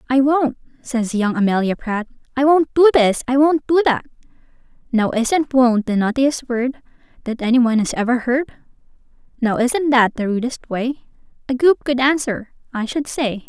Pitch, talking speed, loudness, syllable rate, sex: 255 Hz, 170 wpm, -18 LUFS, 4.7 syllables/s, female